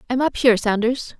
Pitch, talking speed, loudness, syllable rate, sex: 240 Hz, 200 wpm, -19 LUFS, 6.2 syllables/s, female